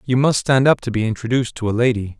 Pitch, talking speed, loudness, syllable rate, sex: 120 Hz, 275 wpm, -18 LUFS, 6.7 syllables/s, male